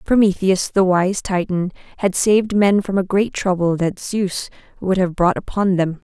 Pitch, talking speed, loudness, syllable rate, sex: 190 Hz, 175 wpm, -18 LUFS, 4.5 syllables/s, female